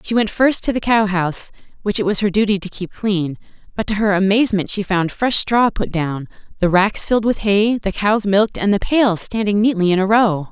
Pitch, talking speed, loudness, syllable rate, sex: 205 Hz, 235 wpm, -17 LUFS, 5.3 syllables/s, female